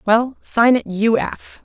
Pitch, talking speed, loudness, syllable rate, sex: 220 Hz, 185 wpm, -17 LUFS, 3.5 syllables/s, female